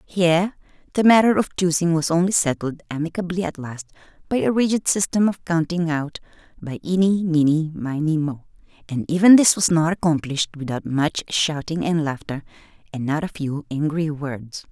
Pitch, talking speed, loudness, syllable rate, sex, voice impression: 165 Hz, 165 wpm, -20 LUFS, 5.1 syllables/s, female, feminine, slightly old, powerful, hard, clear, fluent, intellectual, calm, elegant, strict, sharp